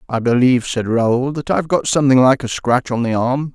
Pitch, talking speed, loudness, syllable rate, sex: 130 Hz, 255 wpm, -16 LUFS, 5.6 syllables/s, male